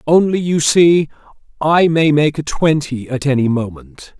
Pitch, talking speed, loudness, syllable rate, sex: 145 Hz, 155 wpm, -14 LUFS, 4.2 syllables/s, male